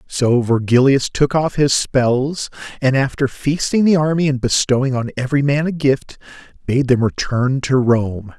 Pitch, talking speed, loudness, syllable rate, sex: 135 Hz, 165 wpm, -17 LUFS, 4.5 syllables/s, male